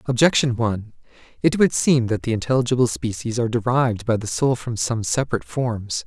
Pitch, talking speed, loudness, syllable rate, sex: 120 Hz, 180 wpm, -21 LUFS, 5.9 syllables/s, male